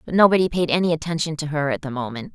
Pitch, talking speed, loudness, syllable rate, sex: 155 Hz, 255 wpm, -21 LUFS, 7.2 syllables/s, female